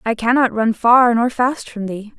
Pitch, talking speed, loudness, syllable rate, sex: 230 Hz, 220 wpm, -16 LUFS, 4.4 syllables/s, female